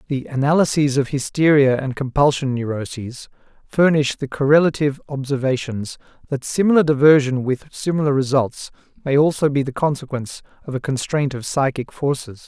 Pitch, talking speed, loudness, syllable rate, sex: 140 Hz, 135 wpm, -19 LUFS, 5.4 syllables/s, male